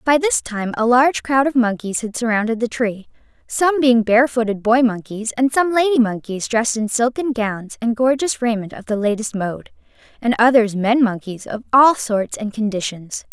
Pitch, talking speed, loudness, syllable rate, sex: 235 Hz, 185 wpm, -18 LUFS, 5.0 syllables/s, female